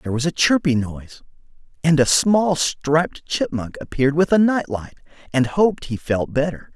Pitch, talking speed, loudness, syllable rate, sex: 150 Hz, 180 wpm, -19 LUFS, 5.2 syllables/s, male